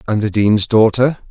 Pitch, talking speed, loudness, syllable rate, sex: 110 Hz, 185 wpm, -14 LUFS, 4.6 syllables/s, male